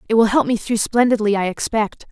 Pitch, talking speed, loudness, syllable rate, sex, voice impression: 220 Hz, 225 wpm, -18 LUFS, 5.7 syllables/s, female, feminine, adult-like, tensed, powerful, slightly hard, slightly soft, fluent, intellectual, lively, sharp